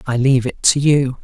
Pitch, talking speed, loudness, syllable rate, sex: 130 Hz, 240 wpm, -15 LUFS, 5.5 syllables/s, male